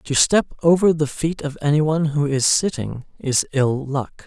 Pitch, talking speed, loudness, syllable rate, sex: 145 Hz, 195 wpm, -19 LUFS, 4.7 syllables/s, male